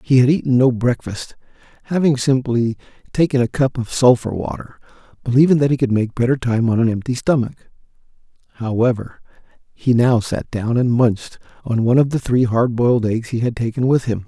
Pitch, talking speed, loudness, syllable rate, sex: 120 Hz, 185 wpm, -18 LUFS, 5.5 syllables/s, male